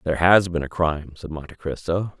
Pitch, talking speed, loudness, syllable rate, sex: 85 Hz, 220 wpm, -22 LUFS, 5.9 syllables/s, male